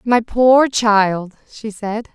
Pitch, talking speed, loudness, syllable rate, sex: 220 Hz, 140 wpm, -15 LUFS, 2.7 syllables/s, female